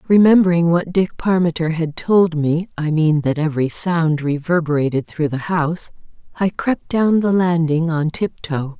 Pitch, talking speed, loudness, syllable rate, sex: 165 Hz, 155 wpm, -18 LUFS, 4.6 syllables/s, female